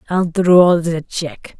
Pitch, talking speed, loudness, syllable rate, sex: 170 Hz, 150 wpm, -15 LUFS, 3.6 syllables/s, female